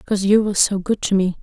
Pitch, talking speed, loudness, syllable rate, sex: 195 Hz, 295 wpm, -18 LUFS, 6.4 syllables/s, female